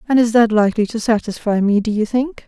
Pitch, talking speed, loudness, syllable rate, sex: 225 Hz, 240 wpm, -17 LUFS, 6.1 syllables/s, female